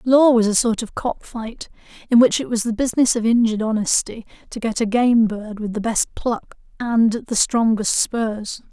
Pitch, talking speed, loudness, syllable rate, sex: 225 Hz, 200 wpm, -19 LUFS, 4.7 syllables/s, female